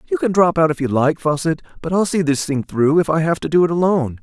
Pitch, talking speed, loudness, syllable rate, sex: 155 Hz, 300 wpm, -17 LUFS, 6.3 syllables/s, male